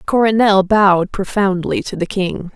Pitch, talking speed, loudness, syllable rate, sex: 195 Hz, 140 wpm, -15 LUFS, 4.5 syllables/s, female